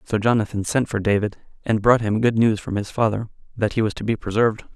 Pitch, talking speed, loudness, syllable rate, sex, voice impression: 110 Hz, 240 wpm, -21 LUFS, 6.1 syllables/s, male, masculine, adult-like, slightly weak, slightly sincere, calm, slightly friendly